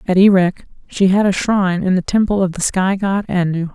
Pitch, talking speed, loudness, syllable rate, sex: 190 Hz, 225 wpm, -16 LUFS, 5.3 syllables/s, female